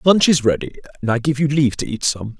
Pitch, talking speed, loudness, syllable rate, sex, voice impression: 135 Hz, 275 wpm, -18 LUFS, 6.6 syllables/s, male, very masculine, very adult-like, slightly old, thick, tensed, powerful, slightly dark, hard, muffled, slightly fluent, raspy, slightly cool, intellectual, sincere, slightly calm, very mature, slightly friendly, very unique, slightly elegant, wild, slightly sweet, slightly lively, kind, modest